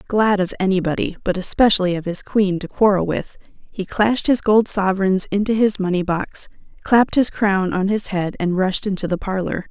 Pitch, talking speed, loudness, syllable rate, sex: 195 Hz, 190 wpm, -19 LUFS, 5.2 syllables/s, female